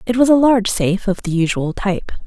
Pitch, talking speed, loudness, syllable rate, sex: 210 Hz, 240 wpm, -16 LUFS, 6.5 syllables/s, female